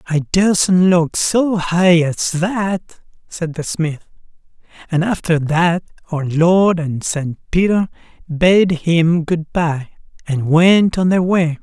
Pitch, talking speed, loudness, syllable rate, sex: 170 Hz, 140 wpm, -16 LUFS, 3.0 syllables/s, male